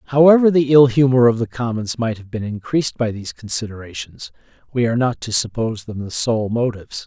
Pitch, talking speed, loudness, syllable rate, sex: 120 Hz, 195 wpm, -18 LUFS, 6.1 syllables/s, male